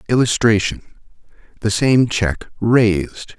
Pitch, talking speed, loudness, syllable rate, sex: 110 Hz, 90 wpm, -17 LUFS, 4.0 syllables/s, male